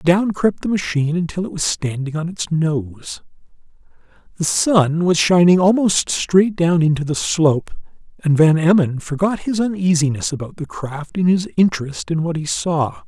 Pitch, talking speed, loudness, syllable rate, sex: 165 Hz, 170 wpm, -18 LUFS, 4.7 syllables/s, male